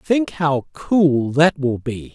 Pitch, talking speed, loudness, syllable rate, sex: 145 Hz, 170 wpm, -18 LUFS, 2.9 syllables/s, male